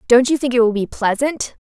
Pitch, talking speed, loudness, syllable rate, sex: 245 Hz, 260 wpm, -17 LUFS, 5.6 syllables/s, female